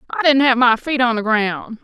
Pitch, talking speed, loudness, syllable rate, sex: 235 Hz, 260 wpm, -16 LUFS, 4.9 syllables/s, female